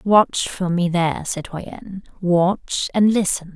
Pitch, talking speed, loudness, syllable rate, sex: 180 Hz, 135 wpm, -20 LUFS, 3.7 syllables/s, female